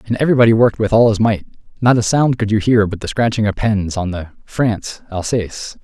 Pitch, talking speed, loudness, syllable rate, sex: 110 Hz, 215 wpm, -16 LUFS, 6.2 syllables/s, male